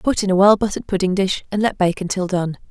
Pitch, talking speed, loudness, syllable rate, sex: 190 Hz, 265 wpm, -18 LUFS, 6.4 syllables/s, female